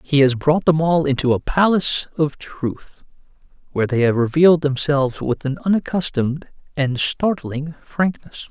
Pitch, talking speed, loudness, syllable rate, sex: 145 Hz, 150 wpm, -19 LUFS, 4.8 syllables/s, male